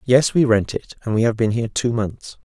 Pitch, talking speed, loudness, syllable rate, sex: 115 Hz, 265 wpm, -20 LUFS, 5.4 syllables/s, male